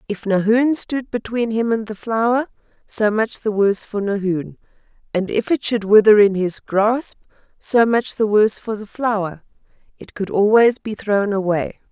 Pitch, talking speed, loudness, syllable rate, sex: 215 Hz, 175 wpm, -18 LUFS, 4.6 syllables/s, female